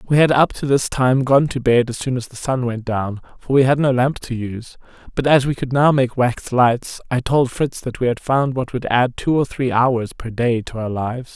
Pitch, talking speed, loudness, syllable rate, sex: 125 Hz, 265 wpm, -18 LUFS, 4.9 syllables/s, male